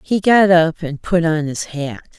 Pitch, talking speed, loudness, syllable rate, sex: 165 Hz, 220 wpm, -16 LUFS, 4.0 syllables/s, female